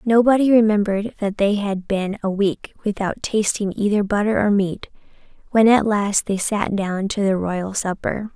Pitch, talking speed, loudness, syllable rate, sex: 205 Hz, 170 wpm, -20 LUFS, 4.6 syllables/s, female